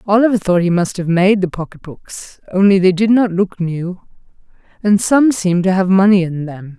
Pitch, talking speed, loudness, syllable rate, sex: 190 Hz, 195 wpm, -14 LUFS, 5.0 syllables/s, female